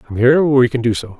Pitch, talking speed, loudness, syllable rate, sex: 125 Hz, 300 wpm, -14 LUFS, 6.1 syllables/s, male